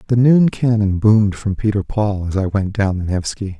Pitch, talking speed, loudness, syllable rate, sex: 105 Hz, 215 wpm, -17 LUFS, 5.0 syllables/s, male